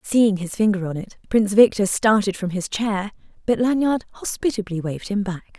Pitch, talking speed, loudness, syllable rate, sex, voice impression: 205 Hz, 185 wpm, -21 LUFS, 5.5 syllables/s, female, very feminine, very middle-aged, very thin, tensed, powerful, very bright, soft, clear, fluent, cool, very intellectual, very refreshing, sincere, calm, friendly, reassuring, unique, very elegant, wild, sweet, lively, kind, slightly intense, slightly sharp